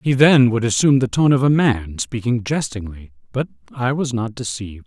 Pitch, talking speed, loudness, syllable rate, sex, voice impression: 120 Hz, 195 wpm, -18 LUFS, 5.2 syllables/s, male, very masculine, very adult-like, very middle-aged, very thick, tensed, very powerful, bright, soft, slightly muffled, fluent, cool, intellectual, very sincere, very calm, very mature, friendly, reassuring, unique, wild, slightly sweet, slightly lively, kind